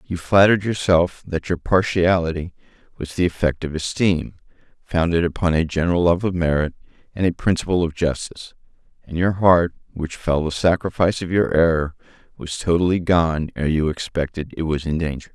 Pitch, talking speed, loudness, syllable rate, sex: 85 Hz, 170 wpm, -20 LUFS, 5.4 syllables/s, male